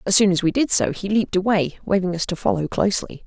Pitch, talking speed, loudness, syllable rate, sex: 190 Hz, 255 wpm, -20 LUFS, 6.5 syllables/s, female